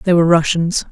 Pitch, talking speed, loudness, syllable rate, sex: 170 Hz, 195 wpm, -14 LUFS, 6.0 syllables/s, female